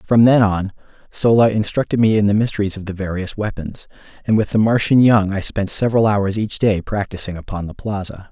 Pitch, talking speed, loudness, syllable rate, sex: 105 Hz, 200 wpm, -17 LUFS, 5.6 syllables/s, male